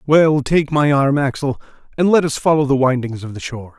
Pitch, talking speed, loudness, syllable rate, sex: 140 Hz, 220 wpm, -16 LUFS, 5.5 syllables/s, male